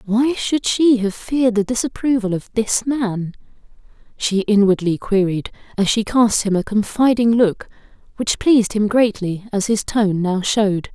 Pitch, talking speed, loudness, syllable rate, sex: 220 Hz, 160 wpm, -18 LUFS, 4.5 syllables/s, female